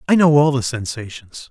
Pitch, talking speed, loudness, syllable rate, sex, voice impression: 130 Hz, 200 wpm, -16 LUFS, 5.2 syllables/s, male, masculine, adult-like, tensed, powerful, clear, fluent, slightly raspy, cool, intellectual, slightly mature, friendly, wild, lively